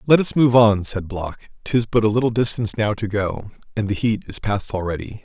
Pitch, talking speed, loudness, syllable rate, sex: 105 Hz, 230 wpm, -20 LUFS, 5.4 syllables/s, male